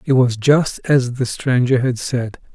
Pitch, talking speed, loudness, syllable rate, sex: 125 Hz, 190 wpm, -17 LUFS, 3.9 syllables/s, male